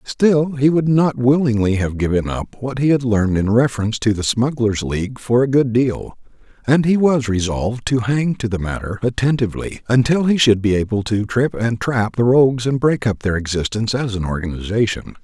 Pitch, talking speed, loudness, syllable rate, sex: 120 Hz, 200 wpm, -18 LUFS, 5.3 syllables/s, male